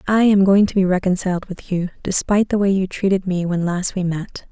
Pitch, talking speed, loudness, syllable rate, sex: 190 Hz, 240 wpm, -18 LUFS, 5.7 syllables/s, female